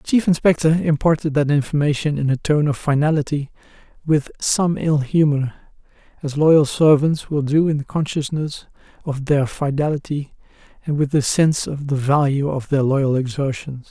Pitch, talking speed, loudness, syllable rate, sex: 145 Hz, 160 wpm, -19 LUFS, 5.0 syllables/s, male